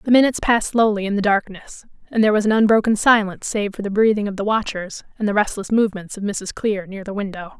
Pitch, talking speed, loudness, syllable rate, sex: 205 Hz, 235 wpm, -19 LUFS, 6.6 syllables/s, female